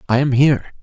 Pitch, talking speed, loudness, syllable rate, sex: 130 Hz, 220 wpm, -15 LUFS, 6.9 syllables/s, male